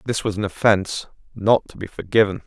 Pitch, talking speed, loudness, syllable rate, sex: 105 Hz, 195 wpm, -20 LUFS, 6.0 syllables/s, male